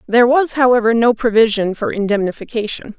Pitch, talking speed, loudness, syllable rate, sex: 230 Hz, 140 wpm, -15 LUFS, 6.0 syllables/s, female